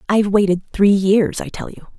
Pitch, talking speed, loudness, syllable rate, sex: 195 Hz, 210 wpm, -16 LUFS, 5.5 syllables/s, female